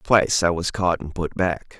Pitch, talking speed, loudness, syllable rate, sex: 90 Hz, 235 wpm, -22 LUFS, 4.9 syllables/s, male